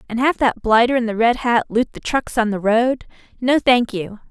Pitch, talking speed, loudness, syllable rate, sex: 235 Hz, 235 wpm, -18 LUFS, 5.1 syllables/s, female